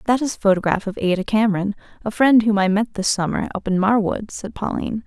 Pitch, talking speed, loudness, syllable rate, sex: 210 Hz, 225 wpm, -20 LUFS, 6.2 syllables/s, female